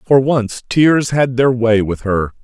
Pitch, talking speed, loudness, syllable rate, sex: 120 Hz, 200 wpm, -15 LUFS, 3.7 syllables/s, male